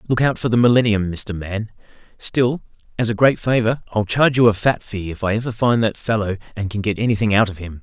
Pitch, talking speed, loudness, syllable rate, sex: 110 Hz, 230 wpm, -19 LUFS, 5.9 syllables/s, male